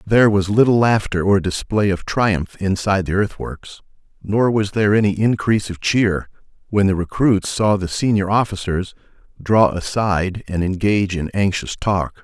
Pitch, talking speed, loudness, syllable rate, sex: 100 Hz, 155 wpm, -18 LUFS, 4.8 syllables/s, male